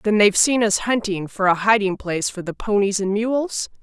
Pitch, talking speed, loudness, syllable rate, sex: 205 Hz, 220 wpm, -19 LUFS, 5.2 syllables/s, female